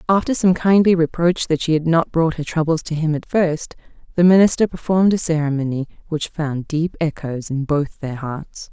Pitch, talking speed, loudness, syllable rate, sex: 160 Hz, 195 wpm, -19 LUFS, 5.1 syllables/s, female